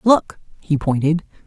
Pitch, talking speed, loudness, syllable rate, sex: 165 Hz, 125 wpm, -19 LUFS, 4.1 syllables/s, female